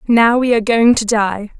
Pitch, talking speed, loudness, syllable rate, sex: 225 Hz, 225 wpm, -13 LUFS, 4.9 syllables/s, female